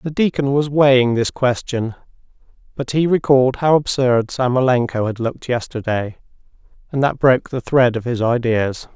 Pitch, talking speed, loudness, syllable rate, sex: 130 Hz, 155 wpm, -17 LUFS, 5.1 syllables/s, male